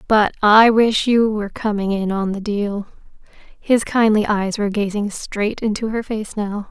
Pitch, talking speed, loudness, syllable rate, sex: 210 Hz, 170 wpm, -18 LUFS, 4.4 syllables/s, female